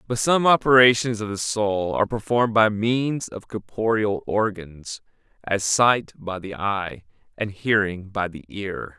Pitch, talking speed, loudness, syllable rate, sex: 105 Hz, 155 wpm, -22 LUFS, 4.1 syllables/s, male